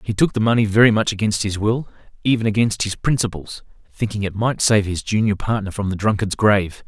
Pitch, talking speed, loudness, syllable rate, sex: 105 Hz, 200 wpm, -19 LUFS, 5.9 syllables/s, male